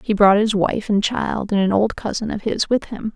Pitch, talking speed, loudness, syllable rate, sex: 210 Hz, 265 wpm, -19 LUFS, 4.9 syllables/s, female